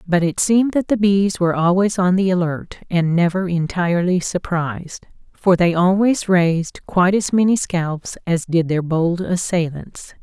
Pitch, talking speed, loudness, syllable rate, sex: 180 Hz, 165 wpm, -18 LUFS, 4.6 syllables/s, female